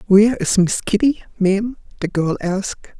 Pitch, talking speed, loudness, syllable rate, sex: 200 Hz, 160 wpm, -18 LUFS, 5.2 syllables/s, female